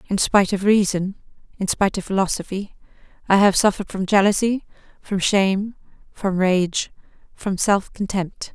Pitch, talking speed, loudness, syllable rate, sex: 195 Hz, 125 wpm, -20 LUFS, 5.1 syllables/s, female